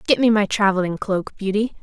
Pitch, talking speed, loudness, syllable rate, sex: 205 Hz, 195 wpm, -20 LUFS, 5.8 syllables/s, female